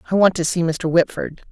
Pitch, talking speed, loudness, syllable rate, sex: 170 Hz, 235 wpm, -19 LUFS, 5.7 syllables/s, female